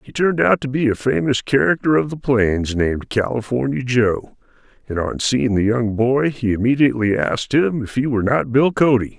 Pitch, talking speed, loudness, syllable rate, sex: 125 Hz, 195 wpm, -18 LUFS, 5.3 syllables/s, male